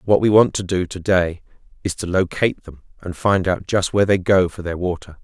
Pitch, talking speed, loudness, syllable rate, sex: 95 Hz, 240 wpm, -19 LUFS, 5.5 syllables/s, male